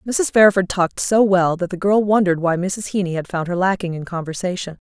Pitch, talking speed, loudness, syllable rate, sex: 185 Hz, 220 wpm, -18 LUFS, 5.8 syllables/s, female